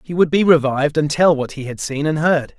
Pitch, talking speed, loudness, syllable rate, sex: 150 Hz, 280 wpm, -17 LUFS, 5.6 syllables/s, male